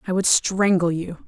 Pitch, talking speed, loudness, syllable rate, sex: 180 Hz, 190 wpm, -20 LUFS, 4.5 syllables/s, female